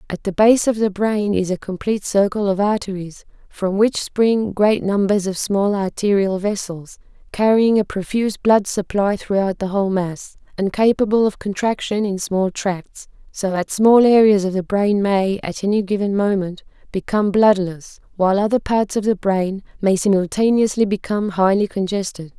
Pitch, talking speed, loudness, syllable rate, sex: 200 Hz, 165 wpm, -18 LUFS, 4.8 syllables/s, female